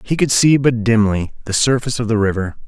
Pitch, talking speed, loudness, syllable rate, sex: 115 Hz, 225 wpm, -16 LUFS, 5.9 syllables/s, male